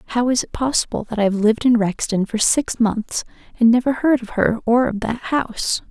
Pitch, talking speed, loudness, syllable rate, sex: 230 Hz, 225 wpm, -19 LUFS, 5.2 syllables/s, female